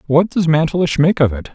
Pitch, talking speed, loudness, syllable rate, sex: 155 Hz, 235 wpm, -15 LUFS, 5.8 syllables/s, male